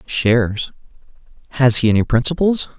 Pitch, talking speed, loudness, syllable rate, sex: 130 Hz, 110 wpm, -16 LUFS, 5.1 syllables/s, male